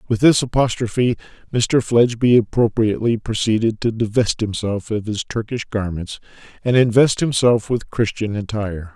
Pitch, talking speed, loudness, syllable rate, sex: 110 Hz, 135 wpm, -19 LUFS, 5.1 syllables/s, male